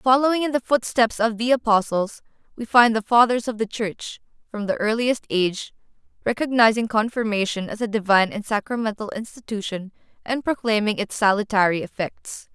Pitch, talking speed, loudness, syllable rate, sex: 220 Hz, 150 wpm, -21 LUFS, 5.4 syllables/s, female